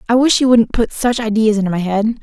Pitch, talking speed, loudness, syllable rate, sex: 225 Hz, 270 wpm, -15 LUFS, 6.2 syllables/s, female